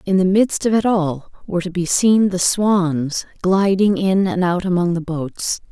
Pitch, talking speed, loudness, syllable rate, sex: 185 Hz, 200 wpm, -18 LUFS, 4.3 syllables/s, female